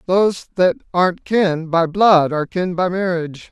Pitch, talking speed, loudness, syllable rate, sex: 175 Hz, 170 wpm, -17 LUFS, 4.9 syllables/s, male